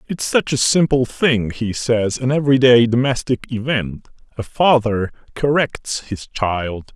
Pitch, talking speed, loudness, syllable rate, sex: 125 Hz, 140 wpm, -18 LUFS, 4.0 syllables/s, male